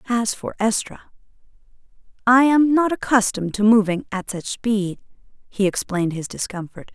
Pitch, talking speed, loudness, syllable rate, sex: 215 Hz, 130 wpm, -20 LUFS, 5.1 syllables/s, female